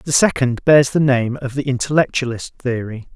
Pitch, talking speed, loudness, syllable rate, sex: 130 Hz, 170 wpm, -17 LUFS, 5.0 syllables/s, male